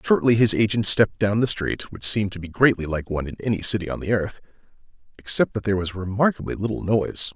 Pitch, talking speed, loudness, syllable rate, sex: 105 Hz, 220 wpm, -22 LUFS, 6.6 syllables/s, male